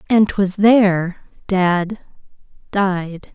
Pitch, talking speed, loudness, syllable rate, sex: 190 Hz, 70 wpm, -17 LUFS, 2.6 syllables/s, female